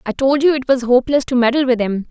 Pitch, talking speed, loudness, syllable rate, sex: 255 Hz, 285 wpm, -15 LUFS, 6.5 syllables/s, female